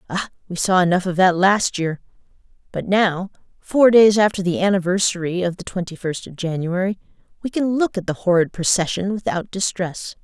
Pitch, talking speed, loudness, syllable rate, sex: 185 Hz, 175 wpm, -19 LUFS, 5.3 syllables/s, female